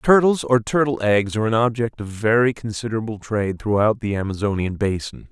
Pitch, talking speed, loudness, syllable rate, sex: 110 Hz, 170 wpm, -20 LUFS, 5.7 syllables/s, male